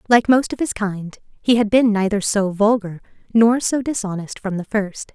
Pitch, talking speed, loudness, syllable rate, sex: 210 Hz, 200 wpm, -19 LUFS, 4.6 syllables/s, female